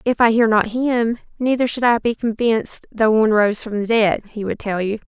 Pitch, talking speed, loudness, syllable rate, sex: 225 Hz, 235 wpm, -18 LUFS, 5.2 syllables/s, female